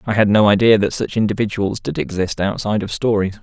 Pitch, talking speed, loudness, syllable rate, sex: 105 Hz, 210 wpm, -17 LUFS, 6.1 syllables/s, male